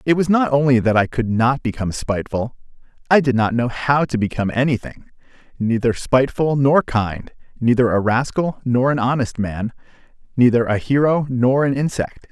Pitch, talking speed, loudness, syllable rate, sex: 125 Hz, 170 wpm, -18 LUFS, 5.2 syllables/s, male